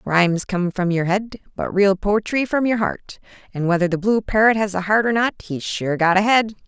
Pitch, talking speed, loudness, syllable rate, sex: 200 Hz, 235 wpm, -19 LUFS, 5.1 syllables/s, female